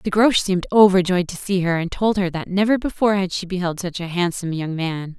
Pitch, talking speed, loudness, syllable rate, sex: 185 Hz, 245 wpm, -20 LUFS, 5.9 syllables/s, female